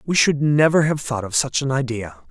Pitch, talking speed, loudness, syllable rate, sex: 135 Hz, 235 wpm, -19 LUFS, 5.1 syllables/s, male